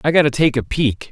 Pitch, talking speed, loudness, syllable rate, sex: 135 Hz, 270 wpm, -17 LUFS, 5.9 syllables/s, male